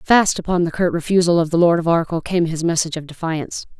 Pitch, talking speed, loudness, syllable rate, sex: 170 Hz, 235 wpm, -18 LUFS, 6.3 syllables/s, female